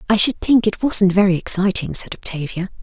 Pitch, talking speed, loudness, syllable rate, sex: 195 Hz, 190 wpm, -17 LUFS, 5.5 syllables/s, female